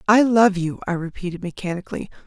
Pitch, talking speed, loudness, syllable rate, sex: 190 Hz, 160 wpm, -21 LUFS, 6.4 syllables/s, female